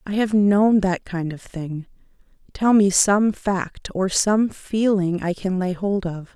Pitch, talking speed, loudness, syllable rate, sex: 195 Hz, 180 wpm, -20 LUFS, 3.6 syllables/s, female